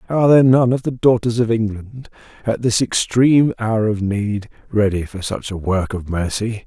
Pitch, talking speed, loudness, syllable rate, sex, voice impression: 110 Hz, 190 wpm, -18 LUFS, 5.0 syllables/s, male, masculine, adult-like, relaxed, slightly weak, slightly soft, raspy, cool, intellectual, mature, friendly, reassuring, wild, kind